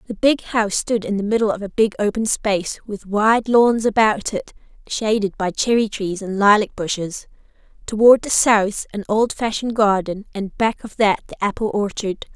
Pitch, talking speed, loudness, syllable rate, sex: 210 Hz, 180 wpm, -19 LUFS, 4.9 syllables/s, female